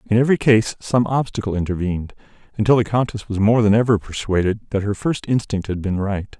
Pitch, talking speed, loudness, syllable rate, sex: 105 Hz, 195 wpm, -19 LUFS, 6.0 syllables/s, male